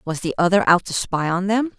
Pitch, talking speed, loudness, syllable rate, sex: 185 Hz, 270 wpm, -19 LUFS, 5.8 syllables/s, female